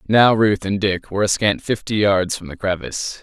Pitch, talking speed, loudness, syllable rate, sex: 100 Hz, 225 wpm, -19 LUFS, 5.3 syllables/s, male